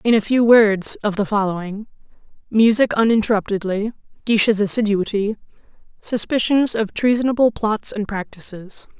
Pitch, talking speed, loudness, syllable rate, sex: 215 Hz, 115 wpm, -18 LUFS, 5.0 syllables/s, female